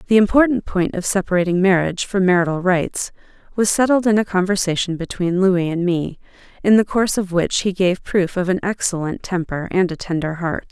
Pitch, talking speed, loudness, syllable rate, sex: 185 Hz, 190 wpm, -18 LUFS, 5.5 syllables/s, female